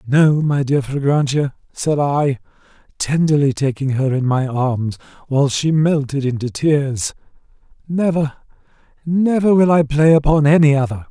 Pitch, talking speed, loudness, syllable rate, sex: 145 Hz, 135 wpm, -17 LUFS, 4.5 syllables/s, male